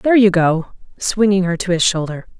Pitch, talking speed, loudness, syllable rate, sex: 190 Hz, 200 wpm, -16 LUFS, 5.4 syllables/s, female